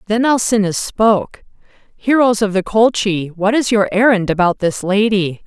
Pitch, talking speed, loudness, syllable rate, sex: 205 Hz, 155 wpm, -15 LUFS, 4.7 syllables/s, female